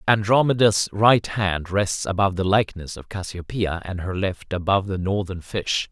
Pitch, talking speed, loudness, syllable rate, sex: 95 Hz, 160 wpm, -22 LUFS, 4.9 syllables/s, male